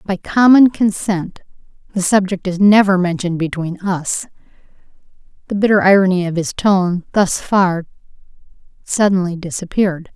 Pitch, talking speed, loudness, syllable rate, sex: 185 Hz, 120 wpm, -15 LUFS, 4.8 syllables/s, female